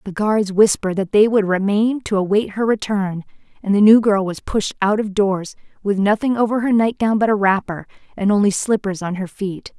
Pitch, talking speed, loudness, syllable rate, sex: 205 Hz, 210 wpm, -18 LUFS, 5.2 syllables/s, female